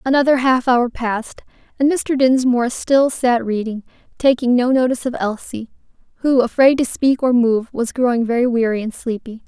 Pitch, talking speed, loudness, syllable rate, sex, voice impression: 245 Hz, 170 wpm, -17 LUFS, 5.2 syllables/s, female, very feminine, slightly young, slightly adult-like, thin, tensed, powerful, bright, very hard, very clear, very fluent, slightly raspy, very cool, intellectual, very refreshing, sincere, slightly calm, slightly friendly, very reassuring, unique, slightly elegant, very wild, slightly sweet, lively, strict, intense, sharp